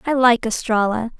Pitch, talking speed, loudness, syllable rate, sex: 230 Hz, 150 wpm, -18 LUFS, 5.0 syllables/s, female